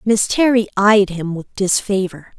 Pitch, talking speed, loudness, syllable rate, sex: 200 Hz, 150 wpm, -16 LUFS, 4.2 syllables/s, female